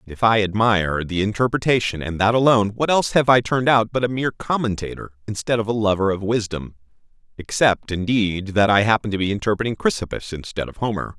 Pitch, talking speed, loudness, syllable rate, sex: 110 Hz, 195 wpm, -20 LUFS, 6.3 syllables/s, male